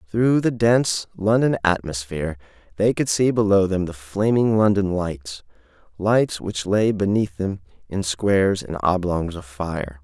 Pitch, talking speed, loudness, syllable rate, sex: 100 Hz, 150 wpm, -21 LUFS, 4.3 syllables/s, male